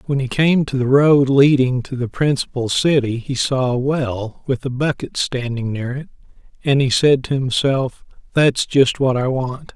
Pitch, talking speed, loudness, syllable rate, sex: 130 Hz, 190 wpm, -18 LUFS, 4.4 syllables/s, male